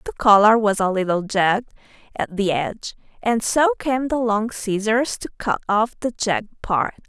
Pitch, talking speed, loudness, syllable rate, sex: 215 Hz, 180 wpm, -20 LUFS, 4.7 syllables/s, female